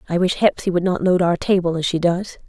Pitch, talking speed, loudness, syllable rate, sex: 180 Hz, 265 wpm, -19 LUFS, 5.9 syllables/s, female